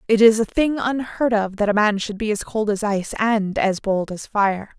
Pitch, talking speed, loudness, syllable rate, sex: 215 Hz, 250 wpm, -20 LUFS, 4.9 syllables/s, female